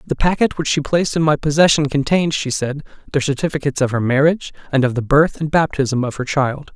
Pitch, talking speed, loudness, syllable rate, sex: 145 Hz, 220 wpm, -17 LUFS, 6.2 syllables/s, male